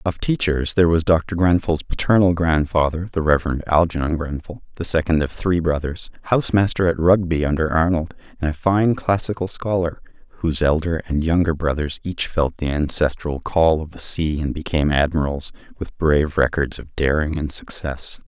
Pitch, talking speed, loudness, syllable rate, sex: 80 Hz, 165 wpm, -20 LUFS, 5.2 syllables/s, male